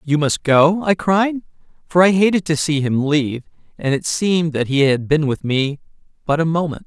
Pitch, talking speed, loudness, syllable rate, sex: 155 Hz, 210 wpm, -17 LUFS, 5.1 syllables/s, male